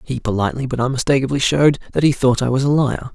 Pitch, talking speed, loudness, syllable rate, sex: 130 Hz, 230 wpm, -17 LUFS, 6.9 syllables/s, male